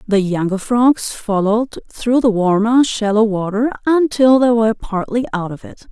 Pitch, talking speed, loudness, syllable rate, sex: 225 Hz, 160 wpm, -16 LUFS, 4.5 syllables/s, female